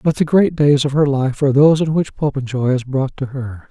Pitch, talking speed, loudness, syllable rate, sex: 140 Hz, 260 wpm, -16 LUFS, 5.5 syllables/s, male